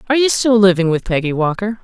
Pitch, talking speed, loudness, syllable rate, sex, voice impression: 200 Hz, 230 wpm, -15 LUFS, 6.7 syllables/s, female, feminine, adult-like, slightly powerful, slightly hard, clear, fluent, intellectual, slightly calm, elegant, lively, slightly strict